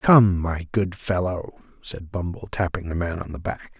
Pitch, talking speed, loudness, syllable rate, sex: 90 Hz, 190 wpm, -25 LUFS, 4.6 syllables/s, male